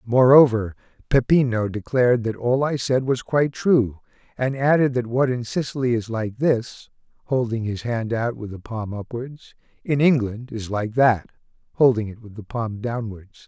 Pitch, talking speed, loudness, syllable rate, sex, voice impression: 120 Hz, 170 wpm, -21 LUFS, 3.7 syllables/s, male, very masculine, very adult-like, very thick, very tensed, very powerful, bright, soft, muffled, fluent, raspy, cool, very intellectual, sincere, very calm, very reassuring, very unique, elegant, very wild, sweet, lively, very kind